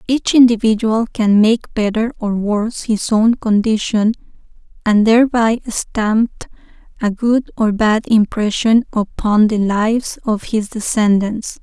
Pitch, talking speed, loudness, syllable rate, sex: 220 Hz, 125 wpm, -15 LUFS, 4.0 syllables/s, female